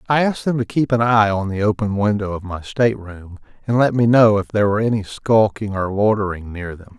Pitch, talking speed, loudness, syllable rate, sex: 105 Hz, 240 wpm, -18 LUFS, 5.8 syllables/s, male